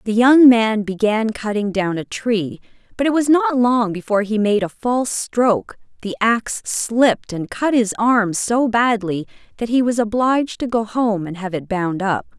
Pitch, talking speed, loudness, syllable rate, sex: 220 Hz, 195 wpm, -18 LUFS, 4.6 syllables/s, female